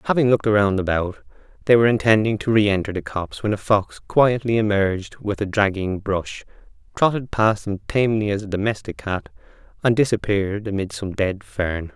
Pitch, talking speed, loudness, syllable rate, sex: 105 Hz, 170 wpm, -21 LUFS, 5.5 syllables/s, male